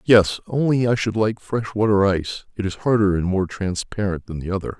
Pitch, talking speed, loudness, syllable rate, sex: 100 Hz, 215 wpm, -21 LUFS, 5.3 syllables/s, male